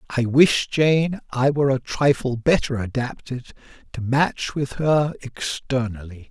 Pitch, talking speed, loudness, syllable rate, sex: 130 Hz, 135 wpm, -21 LUFS, 4.2 syllables/s, male